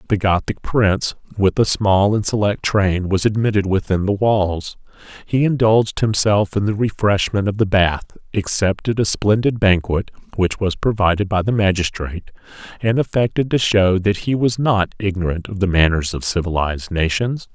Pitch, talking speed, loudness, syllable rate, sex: 100 Hz, 165 wpm, -18 LUFS, 4.9 syllables/s, male